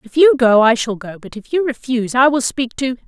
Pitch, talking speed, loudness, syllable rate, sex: 250 Hz, 275 wpm, -15 LUFS, 5.7 syllables/s, female